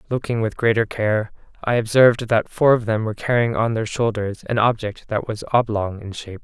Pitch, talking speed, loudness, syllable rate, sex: 110 Hz, 205 wpm, -20 LUFS, 5.4 syllables/s, male